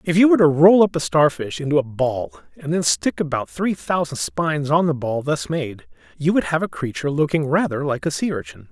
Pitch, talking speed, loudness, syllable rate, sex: 150 Hz, 235 wpm, -20 LUFS, 5.5 syllables/s, male